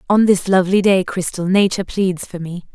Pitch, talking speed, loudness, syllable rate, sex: 185 Hz, 195 wpm, -17 LUFS, 5.6 syllables/s, female